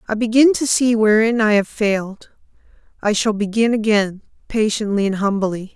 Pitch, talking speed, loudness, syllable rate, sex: 215 Hz, 155 wpm, -17 LUFS, 5.0 syllables/s, female